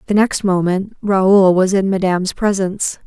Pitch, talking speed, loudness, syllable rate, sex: 190 Hz, 155 wpm, -15 LUFS, 4.6 syllables/s, female